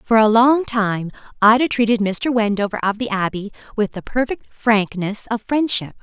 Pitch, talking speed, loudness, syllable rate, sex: 220 Hz, 170 wpm, -18 LUFS, 4.8 syllables/s, female